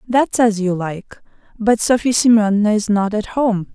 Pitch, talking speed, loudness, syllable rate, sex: 215 Hz, 175 wpm, -16 LUFS, 4.6 syllables/s, female